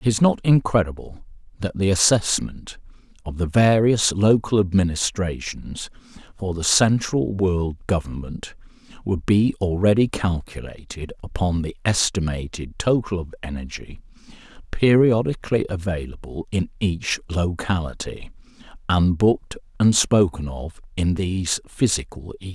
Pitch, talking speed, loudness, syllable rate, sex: 95 Hz, 110 wpm, -21 LUFS, 4.5 syllables/s, male